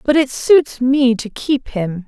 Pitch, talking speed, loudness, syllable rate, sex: 255 Hz, 200 wpm, -16 LUFS, 3.6 syllables/s, female